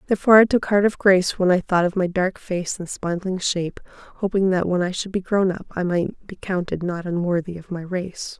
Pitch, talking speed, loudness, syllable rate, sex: 185 Hz, 235 wpm, -21 LUFS, 5.5 syllables/s, female